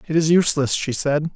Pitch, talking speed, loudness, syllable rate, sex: 155 Hz, 220 wpm, -19 LUFS, 5.8 syllables/s, male